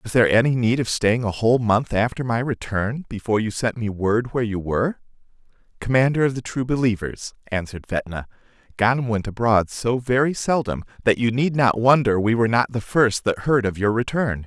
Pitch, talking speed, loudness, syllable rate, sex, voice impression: 115 Hz, 200 wpm, -21 LUFS, 5.6 syllables/s, male, masculine, adult-like, tensed, powerful, bright, clear, slightly raspy, cool, intellectual, friendly, lively, slightly kind